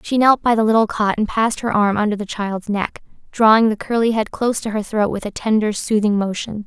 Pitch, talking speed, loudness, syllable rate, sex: 215 Hz, 245 wpm, -18 LUFS, 5.8 syllables/s, female